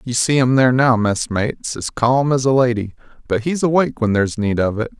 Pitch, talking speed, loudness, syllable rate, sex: 120 Hz, 230 wpm, -17 LUFS, 5.8 syllables/s, male